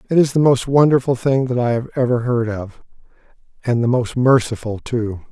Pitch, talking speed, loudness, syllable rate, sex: 125 Hz, 190 wpm, -17 LUFS, 5.3 syllables/s, male